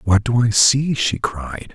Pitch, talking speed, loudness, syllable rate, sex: 110 Hz, 205 wpm, -17 LUFS, 3.6 syllables/s, male